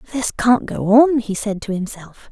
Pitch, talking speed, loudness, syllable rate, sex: 225 Hz, 205 wpm, -17 LUFS, 4.6 syllables/s, female